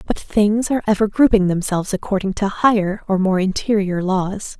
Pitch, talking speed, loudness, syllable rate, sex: 200 Hz, 170 wpm, -18 LUFS, 5.3 syllables/s, female